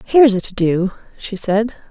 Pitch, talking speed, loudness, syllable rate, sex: 205 Hz, 190 wpm, -16 LUFS, 5.1 syllables/s, female